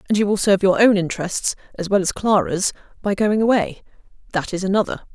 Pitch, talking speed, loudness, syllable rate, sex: 200 Hz, 185 wpm, -19 LUFS, 6.3 syllables/s, female